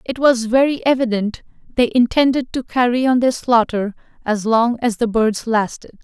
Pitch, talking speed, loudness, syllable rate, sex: 240 Hz, 170 wpm, -17 LUFS, 4.7 syllables/s, female